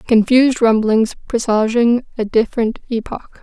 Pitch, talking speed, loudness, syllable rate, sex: 230 Hz, 105 wpm, -16 LUFS, 4.8 syllables/s, female